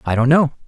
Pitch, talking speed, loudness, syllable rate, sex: 140 Hz, 265 wpm, -15 LUFS, 6.3 syllables/s, male